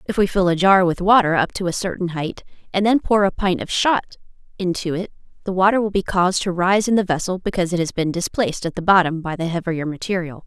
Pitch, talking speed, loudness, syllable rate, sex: 185 Hz, 245 wpm, -19 LUFS, 6.2 syllables/s, female